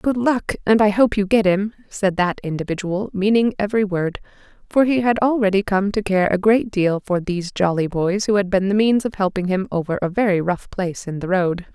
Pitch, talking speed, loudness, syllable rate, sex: 200 Hz, 225 wpm, -19 LUFS, 5.4 syllables/s, female